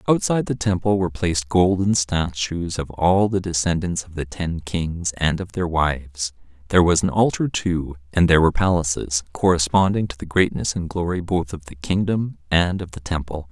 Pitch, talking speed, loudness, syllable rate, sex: 85 Hz, 185 wpm, -21 LUFS, 5.2 syllables/s, male